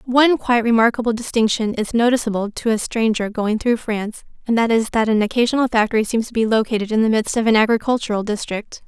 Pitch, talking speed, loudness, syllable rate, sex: 225 Hz, 205 wpm, -18 LUFS, 6.4 syllables/s, female